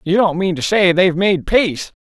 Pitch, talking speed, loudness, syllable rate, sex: 180 Hz, 235 wpm, -15 LUFS, 5.4 syllables/s, male